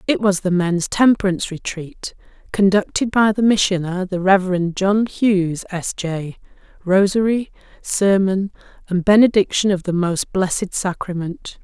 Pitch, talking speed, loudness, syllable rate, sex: 190 Hz, 130 wpm, -18 LUFS, 4.6 syllables/s, female